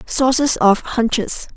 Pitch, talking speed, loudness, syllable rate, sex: 240 Hz, 115 wpm, -16 LUFS, 3.6 syllables/s, female